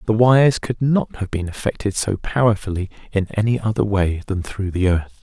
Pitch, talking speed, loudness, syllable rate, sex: 105 Hz, 195 wpm, -20 LUFS, 5.2 syllables/s, male